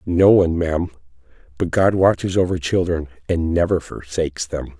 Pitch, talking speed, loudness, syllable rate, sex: 85 Hz, 150 wpm, -19 LUFS, 5.3 syllables/s, male